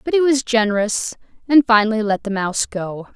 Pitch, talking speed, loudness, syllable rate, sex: 225 Hz, 190 wpm, -18 LUFS, 5.5 syllables/s, female